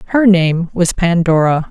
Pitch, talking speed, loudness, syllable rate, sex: 175 Hz, 140 wpm, -13 LUFS, 4.3 syllables/s, female